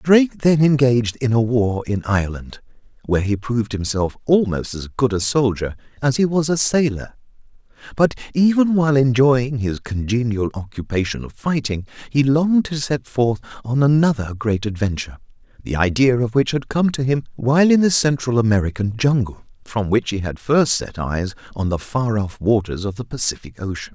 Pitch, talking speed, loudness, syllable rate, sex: 120 Hz, 175 wpm, -19 LUFS, 5.2 syllables/s, male